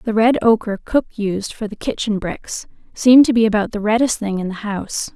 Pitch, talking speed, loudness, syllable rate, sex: 215 Hz, 220 wpm, -18 LUFS, 5.2 syllables/s, female